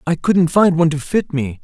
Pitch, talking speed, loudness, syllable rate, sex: 160 Hz, 255 wpm, -16 LUFS, 5.3 syllables/s, male